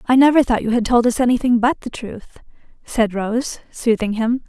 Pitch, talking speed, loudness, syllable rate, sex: 235 Hz, 200 wpm, -18 LUFS, 5.0 syllables/s, female